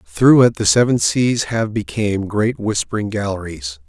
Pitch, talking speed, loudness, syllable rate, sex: 110 Hz, 155 wpm, -17 LUFS, 4.6 syllables/s, male